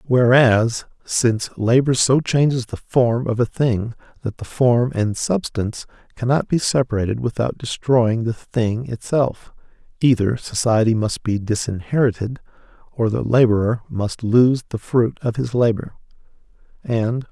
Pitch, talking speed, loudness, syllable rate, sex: 120 Hz, 135 wpm, -19 LUFS, 4.3 syllables/s, male